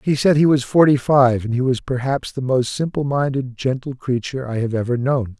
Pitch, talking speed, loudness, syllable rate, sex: 130 Hz, 225 wpm, -19 LUFS, 5.3 syllables/s, male